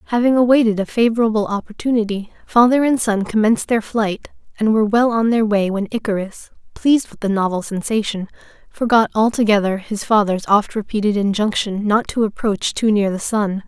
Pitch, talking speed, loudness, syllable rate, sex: 215 Hz, 165 wpm, -17 LUFS, 5.5 syllables/s, female